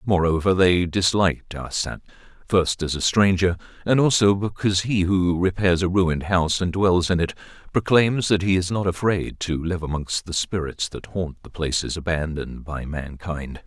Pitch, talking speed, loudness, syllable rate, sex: 90 Hz, 170 wpm, -22 LUFS, 4.8 syllables/s, male